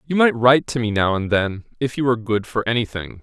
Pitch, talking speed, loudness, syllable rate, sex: 115 Hz, 280 wpm, -20 LUFS, 6.1 syllables/s, male